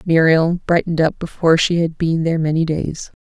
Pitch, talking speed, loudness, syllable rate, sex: 165 Hz, 185 wpm, -17 LUFS, 5.7 syllables/s, female